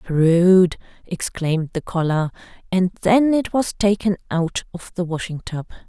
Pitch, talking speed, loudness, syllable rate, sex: 180 Hz, 145 wpm, -20 LUFS, 4.5 syllables/s, female